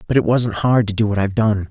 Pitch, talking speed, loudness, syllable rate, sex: 110 Hz, 315 wpm, -17 LUFS, 6.5 syllables/s, male